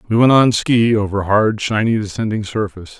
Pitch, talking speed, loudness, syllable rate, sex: 105 Hz, 180 wpm, -16 LUFS, 5.3 syllables/s, male